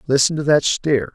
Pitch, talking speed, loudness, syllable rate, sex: 140 Hz, 210 wpm, -17 LUFS, 5.1 syllables/s, male